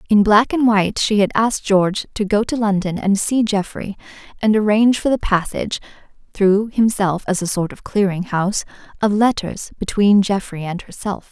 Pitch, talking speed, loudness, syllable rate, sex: 205 Hz, 170 wpm, -18 LUFS, 5.2 syllables/s, female